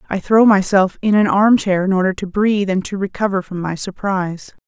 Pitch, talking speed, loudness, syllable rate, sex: 195 Hz, 220 wpm, -16 LUFS, 5.5 syllables/s, female